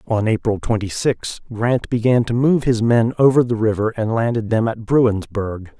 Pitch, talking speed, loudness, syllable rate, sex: 115 Hz, 185 wpm, -18 LUFS, 4.6 syllables/s, male